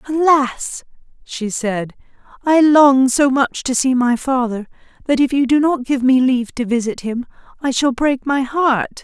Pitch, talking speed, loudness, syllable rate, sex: 260 Hz, 180 wpm, -16 LUFS, 4.3 syllables/s, female